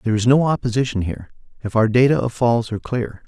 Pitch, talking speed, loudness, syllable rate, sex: 120 Hz, 220 wpm, -19 LUFS, 6.7 syllables/s, male